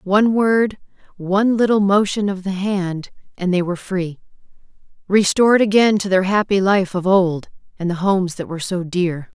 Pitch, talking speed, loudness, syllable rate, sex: 190 Hz, 170 wpm, -18 LUFS, 5.1 syllables/s, female